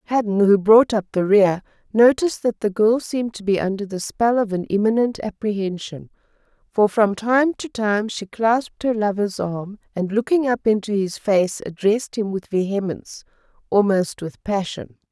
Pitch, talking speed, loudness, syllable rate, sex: 210 Hz, 170 wpm, -20 LUFS, 4.9 syllables/s, female